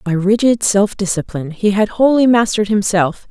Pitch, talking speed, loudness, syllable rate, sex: 205 Hz, 165 wpm, -15 LUFS, 5.3 syllables/s, female